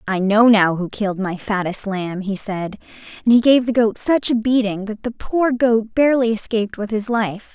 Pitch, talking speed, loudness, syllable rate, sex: 215 Hz, 215 wpm, -18 LUFS, 4.9 syllables/s, female